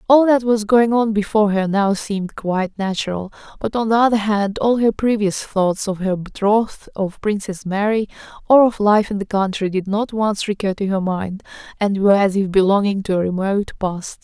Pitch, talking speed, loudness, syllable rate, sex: 205 Hz, 200 wpm, -18 LUFS, 5.2 syllables/s, female